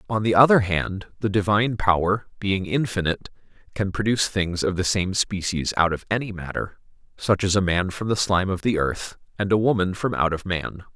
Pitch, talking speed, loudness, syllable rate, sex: 95 Hz, 205 wpm, -23 LUFS, 5.5 syllables/s, male